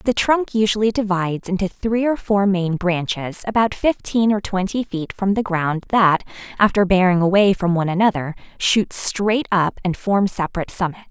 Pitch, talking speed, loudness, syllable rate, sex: 195 Hz, 175 wpm, -19 LUFS, 5.0 syllables/s, female